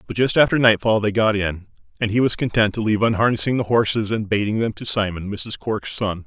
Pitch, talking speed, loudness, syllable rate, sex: 110 Hz, 230 wpm, -20 LUFS, 5.9 syllables/s, male